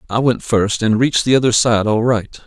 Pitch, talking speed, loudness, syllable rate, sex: 115 Hz, 245 wpm, -15 LUFS, 5.4 syllables/s, male